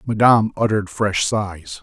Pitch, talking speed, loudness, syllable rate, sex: 95 Hz, 130 wpm, -18 LUFS, 4.8 syllables/s, male